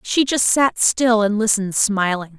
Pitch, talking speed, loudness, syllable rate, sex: 215 Hz, 175 wpm, -17 LUFS, 4.4 syllables/s, female